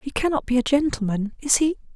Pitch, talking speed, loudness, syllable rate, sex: 265 Hz, 185 wpm, -22 LUFS, 6.0 syllables/s, female